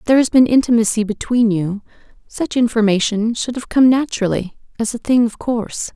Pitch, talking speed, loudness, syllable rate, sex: 230 Hz, 170 wpm, -17 LUFS, 5.8 syllables/s, female